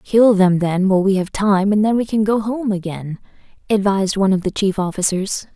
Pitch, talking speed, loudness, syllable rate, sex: 200 Hz, 215 wpm, -17 LUFS, 5.5 syllables/s, female